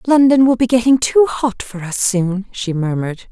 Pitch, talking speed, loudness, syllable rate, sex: 225 Hz, 200 wpm, -15 LUFS, 4.8 syllables/s, female